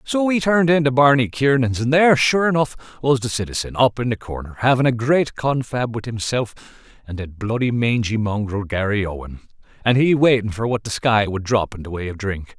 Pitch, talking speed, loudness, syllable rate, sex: 120 Hz, 205 wpm, -19 LUFS, 5.5 syllables/s, male